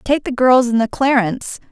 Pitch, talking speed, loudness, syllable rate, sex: 245 Hz, 210 wpm, -15 LUFS, 5.0 syllables/s, female